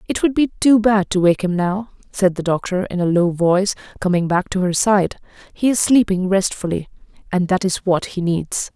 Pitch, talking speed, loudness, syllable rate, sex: 190 Hz, 210 wpm, -18 LUFS, 5.1 syllables/s, female